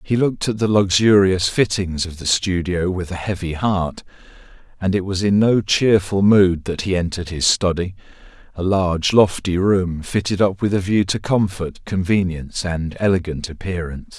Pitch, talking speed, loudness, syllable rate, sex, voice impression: 95 Hz, 170 wpm, -19 LUFS, 4.9 syllables/s, male, masculine, very adult-like, slightly thick, cool, sincere, slightly wild